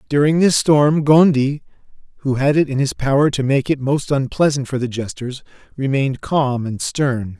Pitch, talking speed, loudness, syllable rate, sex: 135 Hz, 180 wpm, -17 LUFS, 4.8 syllables/s, male